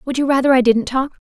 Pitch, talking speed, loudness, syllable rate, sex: 260 Hz, 265 wpm, -16 LUFS, 6.5 syllables/s, female